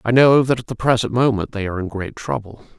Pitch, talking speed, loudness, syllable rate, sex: 115 Hz, 260 wpm, -19 LUFS, 6.3 syllables/s, male